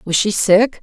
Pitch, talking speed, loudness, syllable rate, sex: 205 Hz, 215 wpm, -15 LUFS, 4.1 syllables/s, female